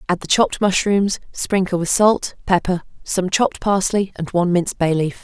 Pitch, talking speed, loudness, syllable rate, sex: 185 Hz, 185 wpm, -18 LUFS, 5.2 syllables/s, female